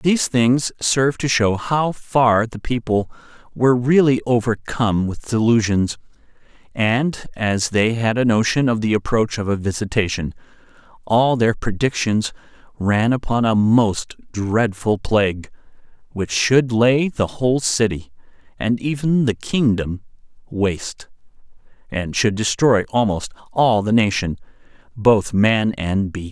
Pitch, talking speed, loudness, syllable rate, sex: 115 Hz, 130 wpm, -19 LUFS, 4.1 syllables/s, male